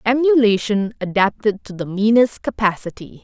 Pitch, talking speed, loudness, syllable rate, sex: 215 Hz, 110 wpm, -18 LUFS, 4.9 syllables/s, female